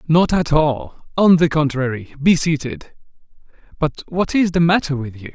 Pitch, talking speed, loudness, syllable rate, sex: 155 Hz, 170 wpm, -18 LUFS, 4.5 syllables/s, male